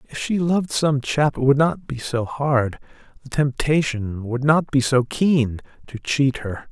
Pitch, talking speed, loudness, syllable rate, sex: 135 Hz, 180 wpm, -21 LUFS, 4.2 syllables/s, male